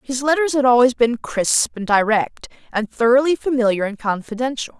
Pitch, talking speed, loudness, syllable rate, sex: 245 Hz, 165 wpm, -18 LUFS, 5.2 syllables/s, female